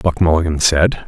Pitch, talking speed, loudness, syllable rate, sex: 85 Hz, 165 wpm, -15 LUFS, 4.9 syllables/s, male